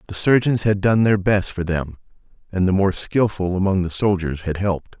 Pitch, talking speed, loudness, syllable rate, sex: 95 Hz, 205 wpm, -20 LUFS, 5.2 syllables/s, male